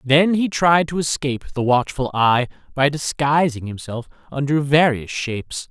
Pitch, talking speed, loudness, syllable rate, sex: 140 Hz, 145 wpm, -19 LUFS, 4.5 syllables/s, male